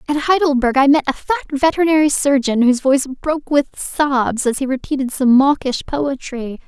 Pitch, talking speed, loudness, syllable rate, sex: 275 Hz, 170 wpm, -16 LUFS, 5.5 syllables/s, female